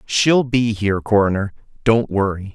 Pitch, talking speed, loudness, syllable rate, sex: 105 Hz, 140 wpm, -18 LUFS, 4.6 syllables/s, male